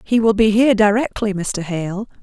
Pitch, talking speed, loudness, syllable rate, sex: 210 Hz, 190 wpm, -17 LUFS, 5.0 syllables/s, female